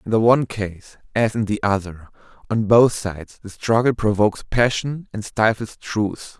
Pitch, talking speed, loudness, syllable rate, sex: 110 Hz, 170 wpm, -20 LUFS, 4.7 syllables/s, male